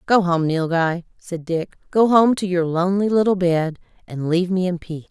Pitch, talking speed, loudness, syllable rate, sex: 180 Hz, 200 wpm, -19 LUFS, 5.2 syllables/s, female